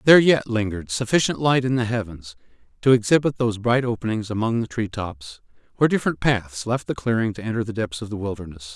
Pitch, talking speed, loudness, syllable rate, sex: 110 Hz, 205 wpm, -22 LUFS, 6.3 syllables/s, male